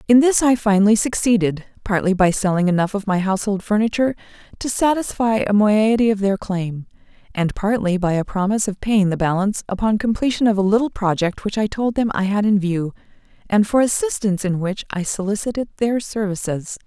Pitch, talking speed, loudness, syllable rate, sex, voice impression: 205 Hz, 180 wpm, -19 LUFS, 5.7 syllables/s, female, very feminine, adult-like, slightly fluent, slightly intellectual, slightly calm, sweet